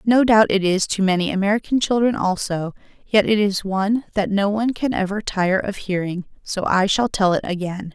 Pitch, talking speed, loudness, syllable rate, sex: 200 Hz, 205 wpm, -20 LUFS, 5.3 syllables/s, female